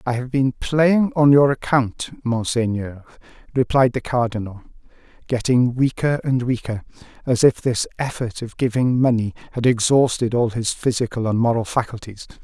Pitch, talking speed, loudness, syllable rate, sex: 120 Hz, 145 wpm, -20 LUFS, 4.8 syllables/s, male